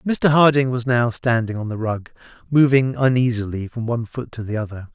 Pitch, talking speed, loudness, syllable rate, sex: 120 Hz, 195 wpm, -20 LUFS, 5.3 syllables/s, male